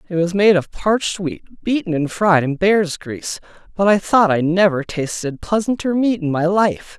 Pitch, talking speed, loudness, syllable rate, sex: 185 Hz, 200 wpm, -18 LUFS, 4.8 syllables/s, male